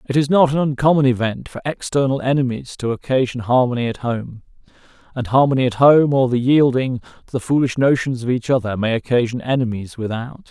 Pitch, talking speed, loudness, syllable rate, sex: 130 Hz, 185 wpm, -18 LUFS, 5.8 syllables/s, male